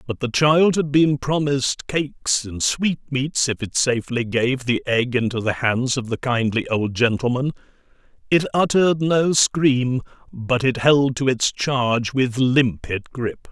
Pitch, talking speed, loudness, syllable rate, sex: 130 Hz, 160 wpm, -20 LUFS, 4.1 syllables/s, male